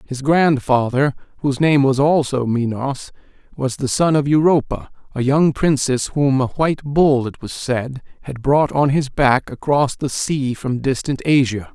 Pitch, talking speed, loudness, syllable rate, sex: 135 Hz, 170 wpm, -18 LUFS, 4.4 syllables/s, male